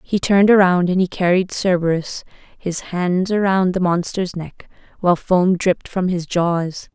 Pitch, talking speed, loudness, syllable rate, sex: 180 Hz, 165 wpm, -18 LUFS, 4.5 syllables/s, female